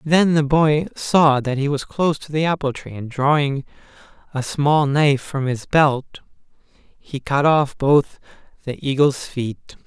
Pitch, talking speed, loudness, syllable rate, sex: 140 Hz, 165 wpm, -19 LUFS, 4.0 syllables/s, male